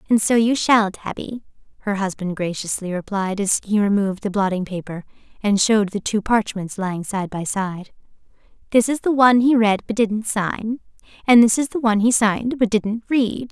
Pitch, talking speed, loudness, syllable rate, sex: 210 Hz, 190 wpm, -19 LUFS, 5.2 syllables/s, female